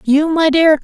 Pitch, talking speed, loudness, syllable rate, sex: 305 Hz, 215 wpm, -13 LUFS, 4.2 syllables/s, female